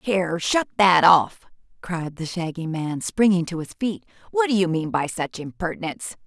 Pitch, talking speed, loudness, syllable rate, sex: 180 Hz, 170 wpm, -22 LUFS, 4.9 syllables/s, female